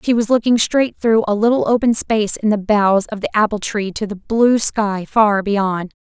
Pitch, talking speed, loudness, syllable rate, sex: 215 Hz, 220 wpm, -16 LUFS, 4.7 syllables/s, female